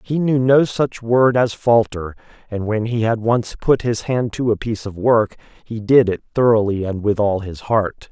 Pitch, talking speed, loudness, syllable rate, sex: 110 Hz, 215 wpm, -18 LUFS, 4.6 syllables/s, male